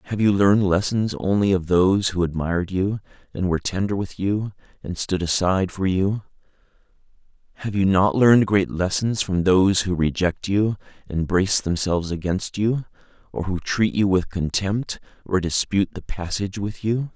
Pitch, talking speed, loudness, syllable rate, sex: 95 Hz, 170 wpm, -22 LUFS, 5.0 syllables/s, male